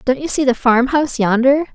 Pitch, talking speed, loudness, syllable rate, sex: 260 Hz, 240 wpm, -15 LUFS, 5.7 syllables/s, female